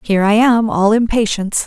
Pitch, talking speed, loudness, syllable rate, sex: 215 Hz, 180 wpm, -14 LUFS, 5.7 syllables/s, female